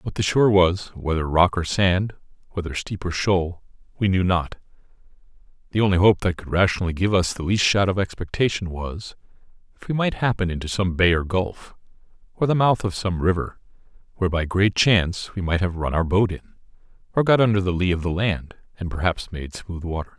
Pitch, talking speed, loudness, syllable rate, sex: 95 Hz, 200 wpm, -22 LUFS, 5.6 syllables/s, male